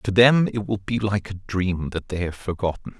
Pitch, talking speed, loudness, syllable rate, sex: 100 Hz, 240 wpm, -23 LUFS, 4.8 syllables/s, male